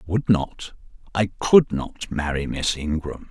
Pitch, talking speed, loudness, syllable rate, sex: 90 Hz, 125 wpm, -22 LUFS, 4.1 syllables/s, male